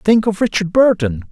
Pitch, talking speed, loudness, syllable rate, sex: 190 Hz, 180 wpm, -15 LUFS, 4.9 syllables/s, male